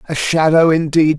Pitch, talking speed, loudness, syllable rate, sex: 160 Hz, 150 wpm, -14 LUFS, 5.0 syllables/s, male